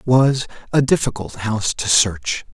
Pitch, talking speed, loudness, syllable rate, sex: 120 Hz, 160 wpm, -18 LUFS, 4.6 syllables/s, male